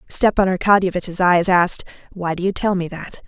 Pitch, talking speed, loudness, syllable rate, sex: 180 Hz, 185 wpm, -18 LUFS, 5.4 syllables/s, female